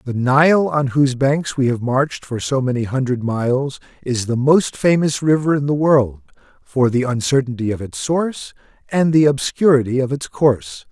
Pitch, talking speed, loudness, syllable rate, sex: 130 Hz, 180 wpm, -17 LUFS, 4.9 syllables/s, male